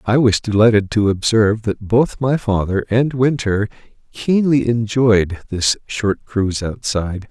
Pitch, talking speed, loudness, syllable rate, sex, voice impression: 110 Hz, 140 wpm, -17 LUFS, 4.3 syllables/s, male, masculine, middle-aged, relaxed, slightly weak, slightly dark, slightly muffled, sincere, calm, mature, slightly friendly, reassuring, kind, slightly modest